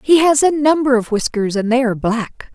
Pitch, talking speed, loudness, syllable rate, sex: 255 Hz, 235 wpm, -15 LUFS, 5.3 syllables/s, female